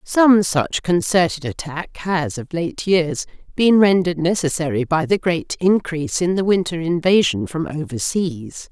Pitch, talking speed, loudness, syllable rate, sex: 170 Hz, 145 wpm, -19 LUFS, 4.4 syllables/s, female